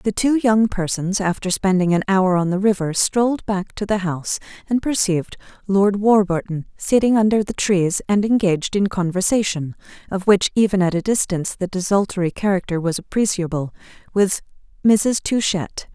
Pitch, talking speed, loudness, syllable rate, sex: 195 Hz, 160 wpm, -19 LUFS, 5.1 syllables/s, female